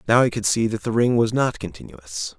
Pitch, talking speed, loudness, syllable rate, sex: 110 Hz, 250 wpm, -21 LUFS, 5.5 syllables/s, male